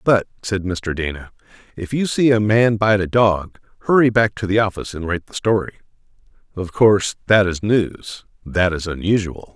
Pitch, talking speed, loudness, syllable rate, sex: 100 Hz, 180 wpm, -18 LUFS, 5.1 syllables/s, male